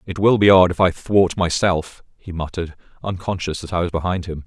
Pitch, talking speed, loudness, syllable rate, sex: 90 Hz, 215 wpm, -19 LUFS, 5.6 syllables/s, male